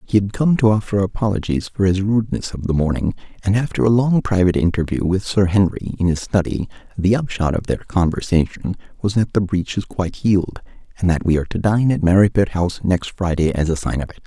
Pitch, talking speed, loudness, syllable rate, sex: 95 Hz, 220 wpm, -19 LUFS, 6.0 syllables/s, male